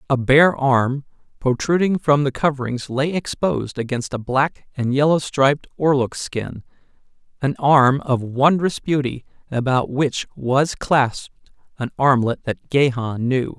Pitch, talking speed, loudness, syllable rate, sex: 135 Hz, 130 wpm, -19 LUFS, 4.2 syllables/s, male